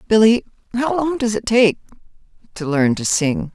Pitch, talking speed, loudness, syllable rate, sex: 215 Hz, 150 wpm, -18 LUFS, 4.7 syllables/s, female